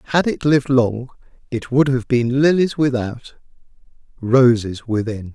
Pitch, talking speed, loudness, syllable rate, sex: 125 Hz, 135 wpm, -18 LUFS, 4.4 syllables/s, male